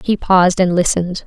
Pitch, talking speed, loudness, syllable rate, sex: 180 Hz, 190 wpm, -14 LUFS, 6.0 syllables/s, female